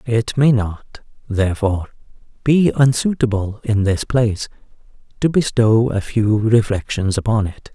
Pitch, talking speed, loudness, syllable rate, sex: 115 Hz, 125 wpm, -18 LUFS, 4.4 syllables/s, male